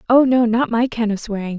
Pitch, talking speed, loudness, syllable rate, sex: 230 Hz, 265 wpm, -18 LUFS, 5.8 syllables/s, female